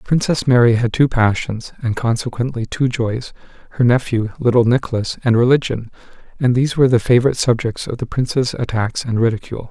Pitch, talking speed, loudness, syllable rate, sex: 120 Hz, 155 wpm, -17 LUFS, 5.9 syllables/s, male